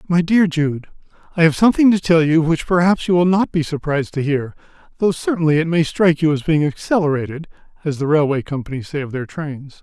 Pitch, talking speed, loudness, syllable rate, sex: 160 Hz, 210 wpm, -17 LUFS, 5.0 syllables/s, male